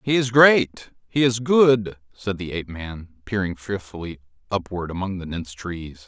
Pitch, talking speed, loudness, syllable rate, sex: 100 Hz, 170 wpm, -22 LUFS, 4.6 syllables/s, male